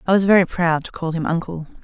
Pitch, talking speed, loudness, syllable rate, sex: 170 Hz, 260 wpm, -19 LUFS, 6.4 syllables/s, female